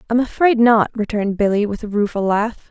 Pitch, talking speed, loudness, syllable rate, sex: 220 Hz, 200 wpm, -17 LUFS, 5.6 syllables/s, female